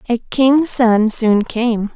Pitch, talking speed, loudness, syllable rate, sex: 235 Hz, 155 wpm, -15 LUFS, 2.8 syllables/s, female